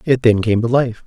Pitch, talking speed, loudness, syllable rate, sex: 120 Hz, 280 wpm, -16 LUFS, 5.2 syllables/s, male